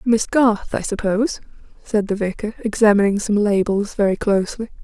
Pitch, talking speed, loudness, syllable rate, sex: 210 Hz, 150 wpm, -19 LUFS, 5.4 syllables/s, female